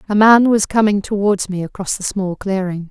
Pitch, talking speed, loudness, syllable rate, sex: 200 Hz, 205 wpm, -16 LUFS, 5.1 syllables/s, female